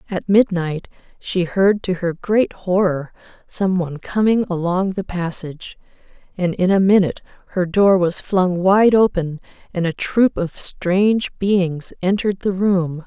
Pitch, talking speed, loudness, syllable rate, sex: 185 Hz, 150 wpm, -18 LUFS, 4.2 syllables/s, female